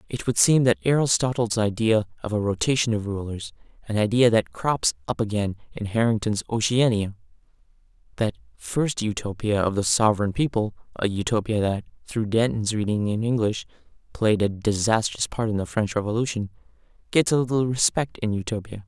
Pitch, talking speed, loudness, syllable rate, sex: 110 Hz, 155 wpm, -24 LUFS, 4.8 syllables/s, male